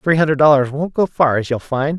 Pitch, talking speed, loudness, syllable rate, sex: 145 Hz, 270 wpm, -16 LUFS, 5.5 syllables/s, male